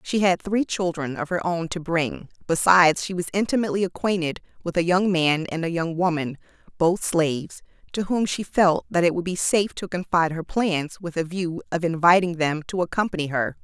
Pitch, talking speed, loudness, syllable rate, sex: 175 Hz, 200 wpm, -23 LUFS, 5.4 syllables/s, female